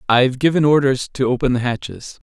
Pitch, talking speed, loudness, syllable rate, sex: 130 Hz, 185 wpm, -17 LUFS, 5.9 syllables/s, male